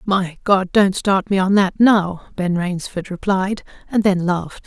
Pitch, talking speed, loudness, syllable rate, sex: 190 Hz, 180 wpm, -18 LUFS, 4.2 syllables/s, female